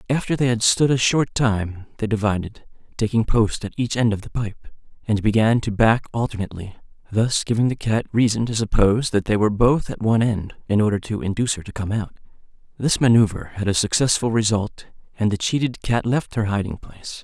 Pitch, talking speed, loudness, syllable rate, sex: 110 Hz, 200 wpm, -21 LUFS, 5.7 syllables/s, male